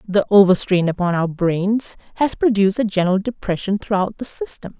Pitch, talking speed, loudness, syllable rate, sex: 200 Hz, 165 wpm, -18 LUFS, 5.4 syllables/s, female